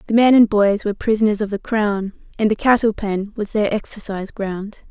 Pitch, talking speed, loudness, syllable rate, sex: 210 Hz, 210 wpm, -18 LUFS, 5.4 syllables/s, female